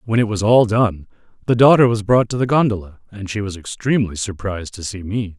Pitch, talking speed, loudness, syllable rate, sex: 105 Hz, 225 wpm, -18 LUFS, 5.9 syllables/s, male